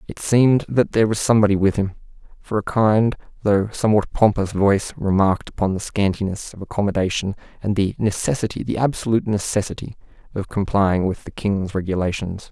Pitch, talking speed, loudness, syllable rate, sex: 100 Hz, 155 wpm, -20 LUFS, 5.9 syllables/s, male